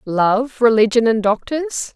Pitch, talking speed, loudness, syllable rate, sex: 235 Hz, 125 wpm, -16 LUFS, 3.8 syllables/s, female